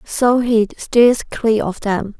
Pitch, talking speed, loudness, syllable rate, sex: 225 Hz, 165 wpm, -16 LUFS, 3.0 syllables/s, female